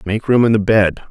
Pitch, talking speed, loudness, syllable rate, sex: 105 Hz, 270 wpm, -14 LUFS, 5.4 syllables/s, male